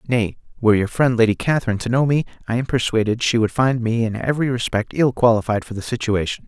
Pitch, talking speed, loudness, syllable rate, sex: 115 Hz, 220 wpm, -19 LUFS, 6.6 syllables/s, male